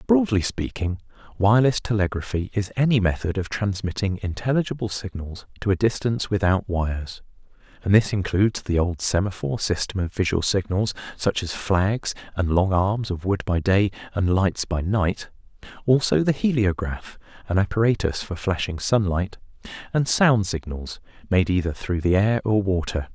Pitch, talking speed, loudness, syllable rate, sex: 100 Hz, 150 wpm, -23 LUFS, 4.8 syllables/s, male